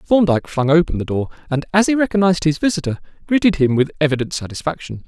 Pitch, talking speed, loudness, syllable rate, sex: 160 Hz, 190 wpm, -18 LUFS, 6.8 syllables/s, male